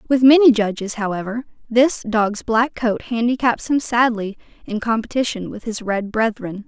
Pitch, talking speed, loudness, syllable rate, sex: 230 Hz, 155 wpm, -19 LUFS, 4.7 syllables/s, female